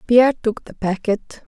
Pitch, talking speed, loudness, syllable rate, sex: 225 Hz, 155 wpm, -20 LUFS, 4.5 syllables/s, female